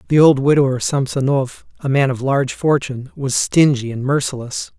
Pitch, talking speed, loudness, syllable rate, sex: 135 Hz, 165 wpm, -17 LUFS, 5.3 syllables/s, male